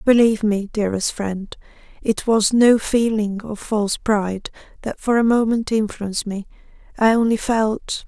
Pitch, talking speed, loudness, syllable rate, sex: 215 Hz, 150 wpm, -19 LUFS, 4.6 syllables/s, female